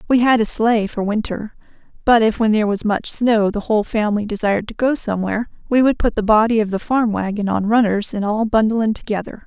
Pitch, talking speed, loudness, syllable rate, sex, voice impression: 215 Hz, 230 wpm, -18 LUFS, 6.0 syllables/s, female, feminine, adult-like, tensed, slightly hard, clear, fluent, intellectual, calm, elegant, slightly strict, slightly intense